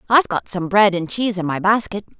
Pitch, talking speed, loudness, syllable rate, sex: 195 Hz, 245 wpm, -18 LUFS, 6.4 syllables/s, female